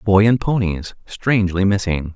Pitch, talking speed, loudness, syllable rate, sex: 100 Hz, 140 wpm, -18 LUFS, 4.6 syllables/s, male